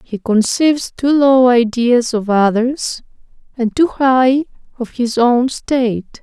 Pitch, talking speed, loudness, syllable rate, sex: 245 Hz, 135 wpm, -14 LUFS, 3.7 syllables/s, female